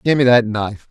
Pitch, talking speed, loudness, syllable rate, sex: 115 Hz, 200 wpm, -15 LUFS, 6.2 syllables/s, male